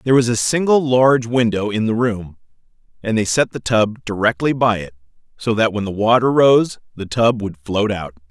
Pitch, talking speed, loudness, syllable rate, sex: 110 Hz, 200 wpm, -17 LUFS, 5.1 syllables/s, male